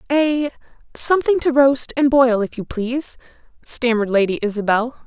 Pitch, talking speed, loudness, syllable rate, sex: 255 Hz, 130 wpm, -18 LUFS, 5.2 syllables/s, female